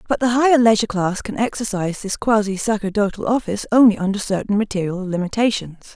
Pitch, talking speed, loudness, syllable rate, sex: 210 Hz, 160 wpm, -19 LUFS, 6.5 syllables/s, female